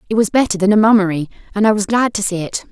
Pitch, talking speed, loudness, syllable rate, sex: 205 Hz, 285 wpm, -15 LUFS, 7.2 syllables/s, female